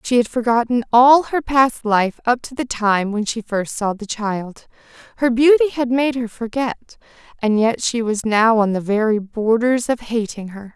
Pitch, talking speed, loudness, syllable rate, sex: 230 Hz, 195 wpm, -18 LUFS, 4.4 syllables/s, female